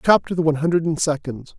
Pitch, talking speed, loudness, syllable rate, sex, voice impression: 160 Hz, 225 wpm, -20 LUFS, 6.9 syllables/s, male, masculine, adult-like, slightly muffled, slightly refreshing, friendly, slightly unique